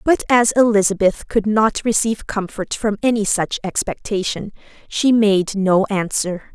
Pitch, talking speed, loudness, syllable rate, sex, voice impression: 210 Hz, 140 wpm, -18 LUFS, 4.4 syllables/s, female, very feminine, slightly adult-like, very thin, tensed, slightly powerful, slightly bright, very hard, very clear, very fluent, very cute, intellectual, very refreshing, slightly sincere, slightly calm, very friendly, slightly reassuring, unique, elegant, slightly wild, very sweet, lively